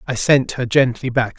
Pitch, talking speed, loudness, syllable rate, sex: 125 Hz, 215 wpm, -17 LUFS, 4.9 syllables/s, male